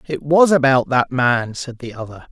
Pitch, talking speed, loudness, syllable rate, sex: 135 Hz, 205 wpm, -16 LUFS, 4.7 syllables/s, male